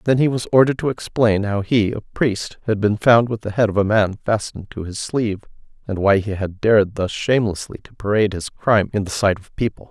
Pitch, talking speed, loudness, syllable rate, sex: 105 Hz, 235 wpm, -19 LUFS, 5.8 syllables/s, male